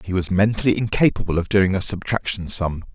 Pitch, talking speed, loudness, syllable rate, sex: 95 Hz, 185 wpm, -20 LUFS, 5.7 syllables/s, male